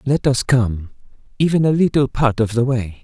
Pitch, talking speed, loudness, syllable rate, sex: 125 Hz, 180 wpm, -17 LUFS, 4.9 syllables/s, male